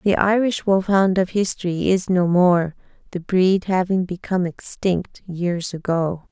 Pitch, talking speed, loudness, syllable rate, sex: 185 Hz, 140 wpm, -20 LUFS, 4.2 syllables/s, female